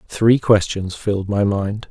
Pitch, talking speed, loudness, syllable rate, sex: 105 Hz, 155 wpm, -18 LUFS, 4.1 syllables/s, male